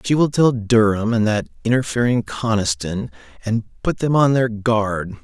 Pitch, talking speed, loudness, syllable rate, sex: 115 Hz, 160 wpm, -19 LUFS, 4.4 syllables/s, male